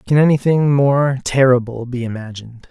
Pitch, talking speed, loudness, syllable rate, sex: 130 Hz, 135 wpm, -16 LUFS, 5.2 syllables/s, male